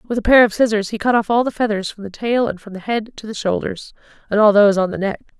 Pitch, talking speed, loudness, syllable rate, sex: 210 Hz, 300 wpm, -17 LUFS, 6.4 syllables/s, female